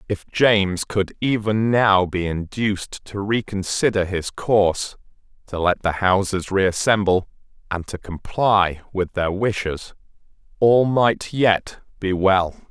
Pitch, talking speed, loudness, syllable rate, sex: 100 Hz, 130 wpm, -20 LUFS, 3.8 syllables/s, male